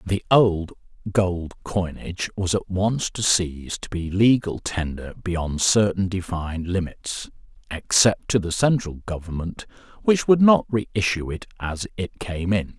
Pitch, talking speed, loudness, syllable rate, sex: 95 Hz, 145 wpm, -23 LUFS, 4.3 syllables/s, male